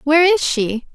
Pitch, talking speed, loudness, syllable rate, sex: 295 Hz, 190 wpm, -16 LUFS, 5.1 syllables/s, female